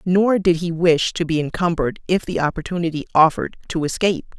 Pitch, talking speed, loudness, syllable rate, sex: 170 Hz, 180 wpm, -19 LUFS, 5.9 syllables/s, female